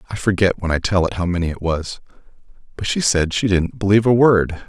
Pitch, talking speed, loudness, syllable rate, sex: 95 Hz, 230 wpm, -18 LUFS, 6.0 syllables/s, male